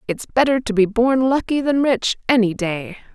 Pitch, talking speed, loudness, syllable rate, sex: 235 Hz, 190 wpm, -18 LUFS, 4.7 syllables/s, female